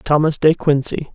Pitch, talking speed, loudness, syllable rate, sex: 150 Hz, 155 wpm, -17 LUFS, 4.6 syllables/s, male